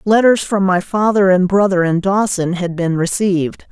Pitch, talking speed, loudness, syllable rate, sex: 190 Hz, 180 wpm, -15 LUFS, 4.7 syllables/s, female